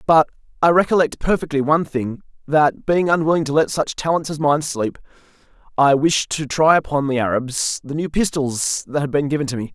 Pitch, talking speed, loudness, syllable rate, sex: 150 Hz, 195 wpm, -19 LUFS, 5.4 syllables/s, male